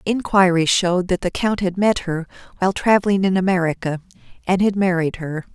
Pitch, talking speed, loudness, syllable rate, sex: 185 Hz, 175 wpm, -19 LUFS, 5.7 syllables/s, female